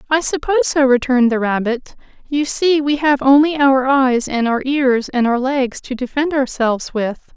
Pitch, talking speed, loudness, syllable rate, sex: 265 Hz, 190 wpm, -16 LUFS, 4.7 syllables/s, female